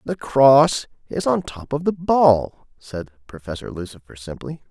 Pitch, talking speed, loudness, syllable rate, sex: 130 Hz, 155 wpm, -18 LUFS, 4.2 syllables/s, male